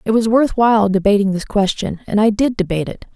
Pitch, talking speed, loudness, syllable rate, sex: 210 Hz, 230 wpm, -16 LUFS, 6.1 syllables/s, female